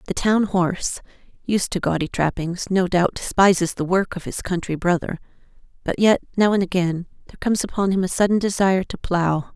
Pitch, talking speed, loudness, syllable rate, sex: 185 Hz, 190 wpm, -21 LUFS, 5.7 syllables/s, female